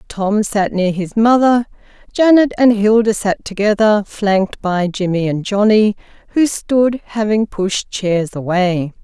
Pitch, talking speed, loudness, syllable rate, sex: 205 Hz, 140 wpm, -15 LUFS, 4.0 syllables/s, female